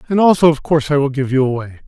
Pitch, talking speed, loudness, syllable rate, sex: 145 Hz, 290 wpm, -15 LUFS, 7.8 syllables/s, male